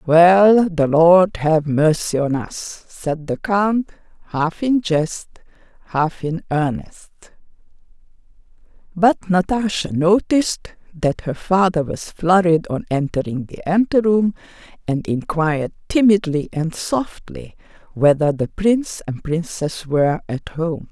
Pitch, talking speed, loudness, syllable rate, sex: 170 Hz, 120 wpm, -18 LUFS, 3.8 syllables/s, female